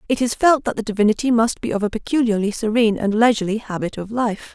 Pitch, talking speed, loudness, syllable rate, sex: 220 Hz, 225 wpm, -19 LUFS, 6.7 syllables/s, female